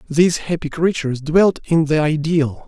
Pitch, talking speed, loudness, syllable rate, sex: 155 Hz, 155 wpm, -18 LUFS, 5.0 syllables/s, male